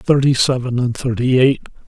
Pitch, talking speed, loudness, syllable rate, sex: 125 Hz, 130 wpm, -16 LUFS, 4.9 syllables/s, male